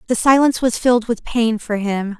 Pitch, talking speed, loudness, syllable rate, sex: 230 Hz, 220 wpm, -17 LUFS, 5.5 syllables/s, female